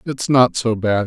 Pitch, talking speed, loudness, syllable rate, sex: 120 Hz, 225 wpm, -17 LUFS, 4.1 syllables/s, male